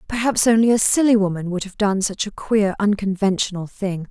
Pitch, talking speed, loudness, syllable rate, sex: 200 Hz, 190 wpm, -19 LUFS, 5.4 syllables/s, female